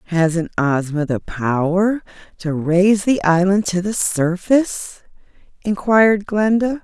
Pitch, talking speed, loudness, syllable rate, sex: 185 Hz, 115 wpm, -17 LUFS, 3.9 syllables/s, female